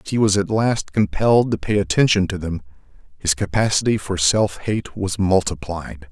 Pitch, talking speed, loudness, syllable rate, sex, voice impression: 95 Hz, 175 wpm, -19 LUFS, 5.0 syllables/s, male, very masculine, very adult-like, slightly old, very thick, tensed, very powerful, bright, slightly hard, clear, fluent, slightly raspy, very cool, intellectual, sincere, very calm, very mature, very friendly, very reassuring, unique, elegant, very wild, sweet, slightly lively, very kind, slightly modest